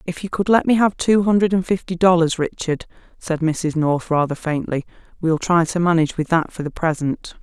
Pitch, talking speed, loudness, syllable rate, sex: 170 Hz, 210 wpm, -19 LUFS, 5.3 syllables/s, female